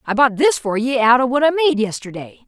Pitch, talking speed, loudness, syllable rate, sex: 245 Hz, 265 wpm, -16 LUFS, 5.7 syllables/s, female